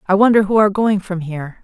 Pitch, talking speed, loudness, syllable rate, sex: 195 Hz, 255 wpm, -15 LUFS, 6.6 syllables/s, female